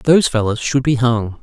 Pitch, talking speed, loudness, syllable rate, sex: 125 Hz, 210 wpm, -16 LUFS, 5.0 syllables/s, male